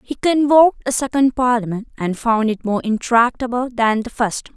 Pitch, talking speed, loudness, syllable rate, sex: 240 Hz, 170 wpm, -17 LUFS, 5.0 syllables/s, female